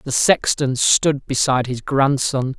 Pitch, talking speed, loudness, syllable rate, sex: 135 Hz, 140 wpm, -18 LUFS, 3.9 syllables/s, male